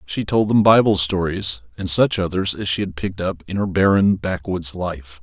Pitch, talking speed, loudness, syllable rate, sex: 90 Hz, 205 wpm, -19 LUFS, 4.9 syllables/s, male